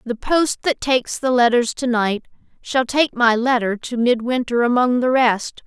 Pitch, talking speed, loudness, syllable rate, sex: 245 Hz, 180 wpm, -18 LUFS, 4.4 syllables/s, female